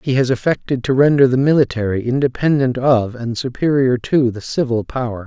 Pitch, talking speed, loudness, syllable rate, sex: 130 Hz, 170 wpm, -17 LUFS, 5.4 syllables/s, male